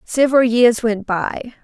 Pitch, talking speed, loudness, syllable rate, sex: 235 Hz, 145 wpm, -16 LUFS, 4.5 syllables/s, female